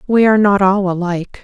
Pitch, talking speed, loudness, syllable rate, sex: 195 Hz, 210 wpm, -14 LUFS, 6.3 syllables/s, female